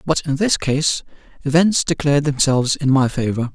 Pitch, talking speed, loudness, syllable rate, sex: 145 Hz, 170 wpm, -18 LUFS, 5.3 syllables/s, male